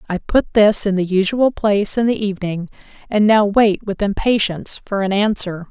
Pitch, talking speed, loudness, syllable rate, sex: 205 Hz, 190 wpm, -17 LUFS, 5.1 syllables/s, female